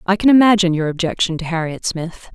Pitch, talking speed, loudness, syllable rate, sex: 180 Hz, 205 wpm, -16 LUFS, 6.4 syllables/s, female